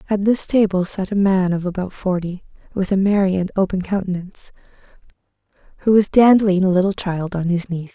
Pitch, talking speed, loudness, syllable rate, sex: 190 Hz, 180 wpm, -18 LUFS, 5.6 syllables/s, female